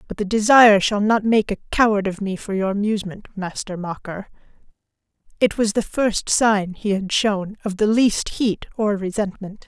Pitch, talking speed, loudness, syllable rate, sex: 205 Hz, 180 wpm, -20 LUFS, 4.9 syllables/s, female